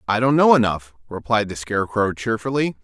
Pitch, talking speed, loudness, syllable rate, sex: 115 Hz, 170 wpm, -19 LUFS, 5.6 syllables/s, male